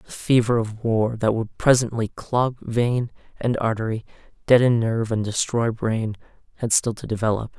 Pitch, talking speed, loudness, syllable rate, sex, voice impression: 115 Hz, 160 wpm, -22 LUFS, 4.7 syllables/s, male, masculine, adult-like, slightly relaxed, slightly weak, soft, slightly fluent, slightly raspy, cool, refreshing, calm, friendly, reassuring, kind, modest